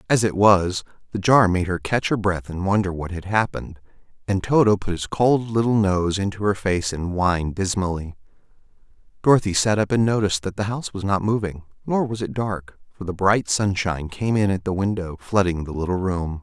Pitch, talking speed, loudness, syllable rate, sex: 100 Hz, 205 wpm, -21 LUFS, 5.4 syllables/s, male